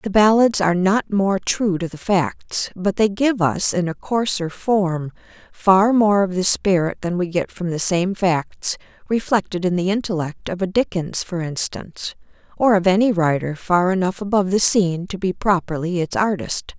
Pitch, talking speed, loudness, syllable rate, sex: 190 Hz, 185 wpm, -19 LUFS, 4.7 syllables/s, female